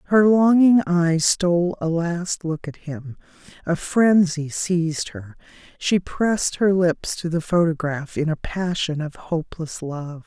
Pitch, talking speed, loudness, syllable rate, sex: 170 Hz, 140 wpm, -21 LUFS, 4.0 syllables/s, female